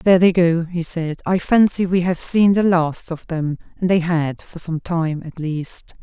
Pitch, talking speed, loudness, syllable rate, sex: 170 Hz, 220 wpm, -19 LUFS, 4.3 syllables/s, female